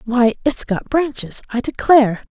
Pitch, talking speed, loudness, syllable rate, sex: 250 Hz, 155 wpm, -17 LUFS, 4.7 syllables/s, female